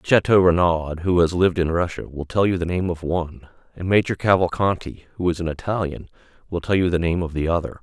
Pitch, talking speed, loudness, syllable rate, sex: 85 Hz, 220 wpm, -21 LUFS, 6.1 syllables/s, male